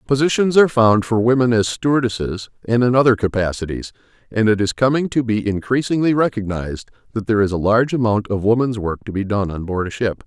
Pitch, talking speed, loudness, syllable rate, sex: 115 Hz, 205 wpm, -18 LUFS, 6.1 syllables/s, male